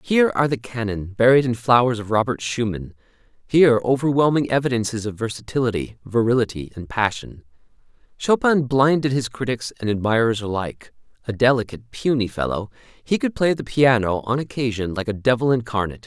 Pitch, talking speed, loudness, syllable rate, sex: 120 Hz, 150 wpm, -20 LUFS, 5.8 syllables/s, male